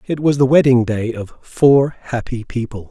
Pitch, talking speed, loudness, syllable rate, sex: 125 Hz, 185 wpm, -16 LUFS, 4.3 syllables/s, male